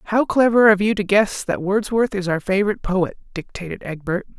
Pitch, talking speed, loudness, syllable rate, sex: 200 Hz, 190 wpm, -19 LUFS, 5.7 syllables/s, female